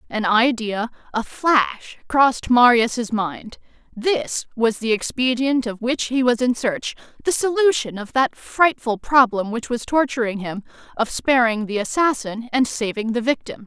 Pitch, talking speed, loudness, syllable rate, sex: 240 Hz, 155 wpm, -20 LUFS, 4.2 syllables/s, female